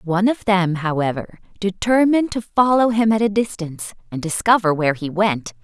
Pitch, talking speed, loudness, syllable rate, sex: 195 Hz, 170 wpm, -19 LUFS, 5.4 syllables/s, female